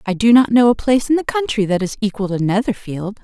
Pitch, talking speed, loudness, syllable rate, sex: 220 Hz, 260 wpm, -16 LUFS, 6.3 syllables/s, female